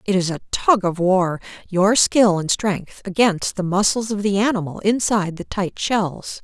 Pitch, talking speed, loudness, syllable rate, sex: 195 Hz, 185 wpm, -19 LUFS, 4.4 syllables/s, female